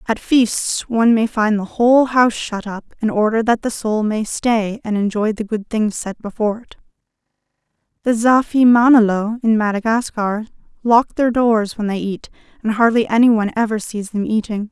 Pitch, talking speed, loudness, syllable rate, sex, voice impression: 220 Hz, 175 wpm, -17 LUFS, 5.0 syllables/s, female, feminine, middle-aged, relaxed, bright, soft, slightly muffled, intellectual, friendly, reassuring, elegant, lively, kind